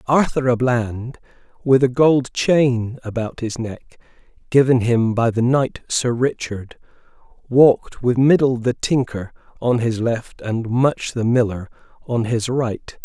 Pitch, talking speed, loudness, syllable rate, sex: 120 Hz, 145 wpm, -19 LUFS, 3.8 syllables/s, male